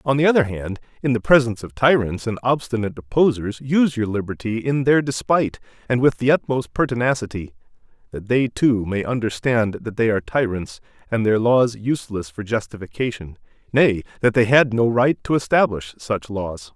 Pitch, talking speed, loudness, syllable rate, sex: 115 Hz, 170 wpm, -20 LUFS, 5.4 syllables/s, male